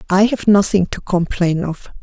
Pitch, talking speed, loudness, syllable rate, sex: 190 Hz, 180 wpm, -16 LUFS, 4.6 syllables/s, female